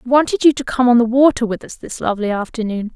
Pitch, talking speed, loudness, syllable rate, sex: 240 Hz, 265 wpm, -16 LUFS, 6.7 syllables/s, female